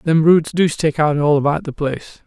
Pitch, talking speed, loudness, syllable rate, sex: 155 Hz, 240 wpm, -16 LUFS, 5.1 syllables/s, male